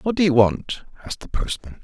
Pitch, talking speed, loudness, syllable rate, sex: 140 Hz, 230 wpm, -21 LUFS, 5.9 syllables/s, male